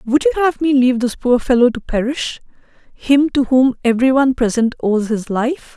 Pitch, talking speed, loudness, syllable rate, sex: 255 Hz, 190 wpm, -16 LUFS, 5.3 syllables/s, female